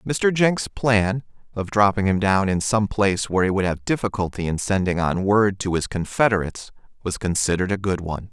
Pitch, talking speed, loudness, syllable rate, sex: 100 Hz, 195 wpm, -21 LUFS, 5.5 syllables/s, male